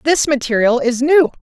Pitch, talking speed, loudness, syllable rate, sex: 270 Hz, 170 wpm, -14 LUFS, 5.0 syllables/s, female